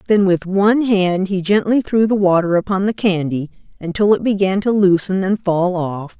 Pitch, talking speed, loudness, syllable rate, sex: 190 Hz, 195 wpm, -16 LUFS, 4.9 syllables/s, female